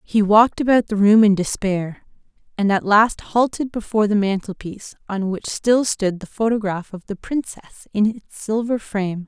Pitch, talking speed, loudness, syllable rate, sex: 210 Hz, 175 wpm, -19 LUFS, 5.1 syllables/s, female